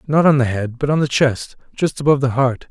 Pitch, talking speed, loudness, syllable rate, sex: 135 Hz, 265 wpm, -17 LUFS, 5.9 syllables/s, male